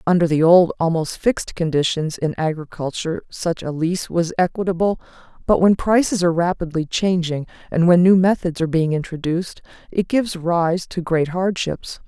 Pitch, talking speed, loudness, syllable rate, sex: 170 Hz, 160 wpm, -19 LUFS, 5.3 syllables/s, female